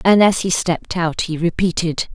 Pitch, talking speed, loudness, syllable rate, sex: 175 Hz, 195 wpm, -18 LUFS, 4.9 syllables/s, female